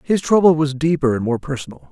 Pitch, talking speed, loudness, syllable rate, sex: 140 Hz, 220 wpm, -18 LUFS, 6.1 syllables/s, male